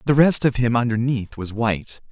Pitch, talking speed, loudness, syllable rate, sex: 120 Hz, 200 wpm, -20 LUFS, 5.3 syllables/s, male